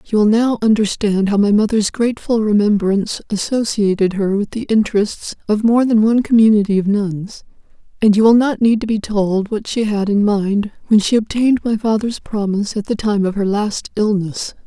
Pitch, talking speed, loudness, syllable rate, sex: 210 Hz, 190 wpm, -16 LUFS, 5.2 syllables/s, female